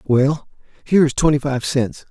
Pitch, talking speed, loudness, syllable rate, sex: 140 Hz, 170 wpm, -18 LUFS, 4.9 syllables/s, male